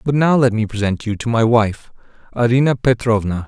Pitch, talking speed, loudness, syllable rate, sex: 115 Hz, 190 wpm, -17 LUFS, 5.4 syllables/s, male